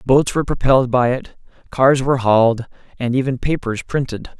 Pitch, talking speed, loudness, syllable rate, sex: 130 Hz, 165 wpm, -17 LUFS, 5.6 syllables/s, male